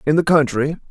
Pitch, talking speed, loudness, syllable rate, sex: 150 Hz, 200 wpm, -17 LUFS, 6.0 syllables/s, male